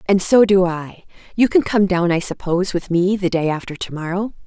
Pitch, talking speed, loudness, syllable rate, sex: 185 Hz, 230 wpm, -18 LUFS, 5.3 syllables/s, female